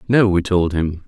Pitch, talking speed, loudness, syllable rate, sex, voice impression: 95 Hz, 225 wpm, -17 LUFS, 4.4 syllables/s, male, very masculine, adult-like, middle-aged, thick, tensed, slightly weak, slightly dark, soft, slightly muffled, slightly fluent, slightly raspy, cool, intellectual, slightly refreshing, sincere, calm, mature, friendly, reassuring, unique, slightly elegant, wild, slightly sweet, lively, kind, slightly modest